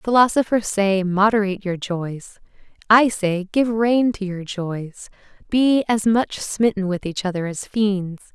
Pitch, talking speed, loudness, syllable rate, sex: 205 Hz, 150 wpm, -20 LUFS, 4.0 syllables/s, female